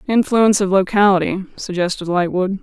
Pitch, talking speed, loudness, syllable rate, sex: 195 Hz, 115 wpm, -17 LUFS, 5.4 syllables/s, female